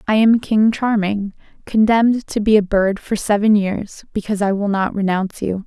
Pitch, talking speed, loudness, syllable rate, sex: 205 Hz, 190 wpm, -17 LUFS, 5.1 syllables/s, female